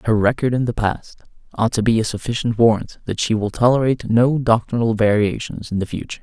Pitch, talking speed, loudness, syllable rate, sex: 115 Hz, 200 wpm, -19 LUFS, 6.0 syllables/s, male